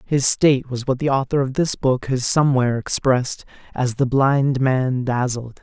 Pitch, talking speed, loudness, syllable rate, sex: 130 Hz, 180 wpm, -19 LUFS, 4.8 syllables/s, male